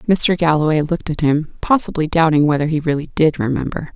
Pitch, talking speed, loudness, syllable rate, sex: 155 Hz, 180 wpm, -17 LUFS, 5.8 syllables/s, female